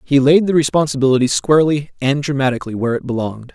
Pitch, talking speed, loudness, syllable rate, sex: 140 Hz, 170 wpm, -16 LUFS, 7.1 syllables/s, male